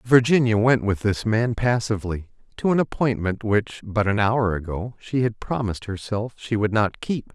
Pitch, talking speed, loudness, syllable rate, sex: 110 Hz, 170 wpm, -23 LUFS, 4.8 syllables/s, male